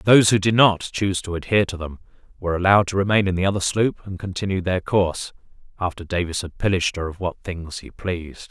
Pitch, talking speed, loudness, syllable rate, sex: 95 Hz, 220 wpm, -21 LUFS, 6.3 syllables/s, male